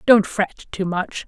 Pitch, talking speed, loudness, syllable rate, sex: 195 Hz, 190 wpm, -21 LUFS, 3.6 syllables/s, female